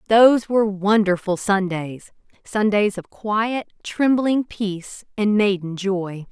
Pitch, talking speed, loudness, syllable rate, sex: 205 Hz, 105 wpm, -20 LUFS, 3.8 syllables/s, female